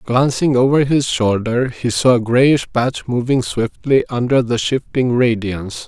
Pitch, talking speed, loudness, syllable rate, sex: 125 Hz, 155 wpm, -16 LUFS, 4.2 syllables/s, male